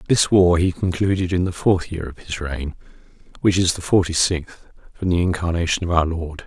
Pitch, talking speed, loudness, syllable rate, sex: 85 Hz, 205 wpm, -20 LUFS, 5.2 syllables/s, male